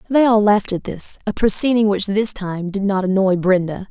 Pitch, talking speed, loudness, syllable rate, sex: 200 Hz, 215 wpm, -17 LUFS, 5.2 syllables/s, female